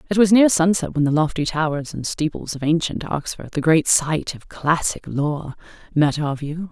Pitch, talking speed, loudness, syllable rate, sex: 160 Hz, 195 wpm, -20 LUFS, 4.7 syllables/s, female